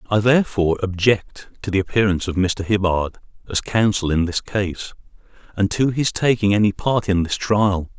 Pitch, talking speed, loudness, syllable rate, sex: 100 Hz, 175 wpm, -19 LUFS, 5.1 syllables/s, male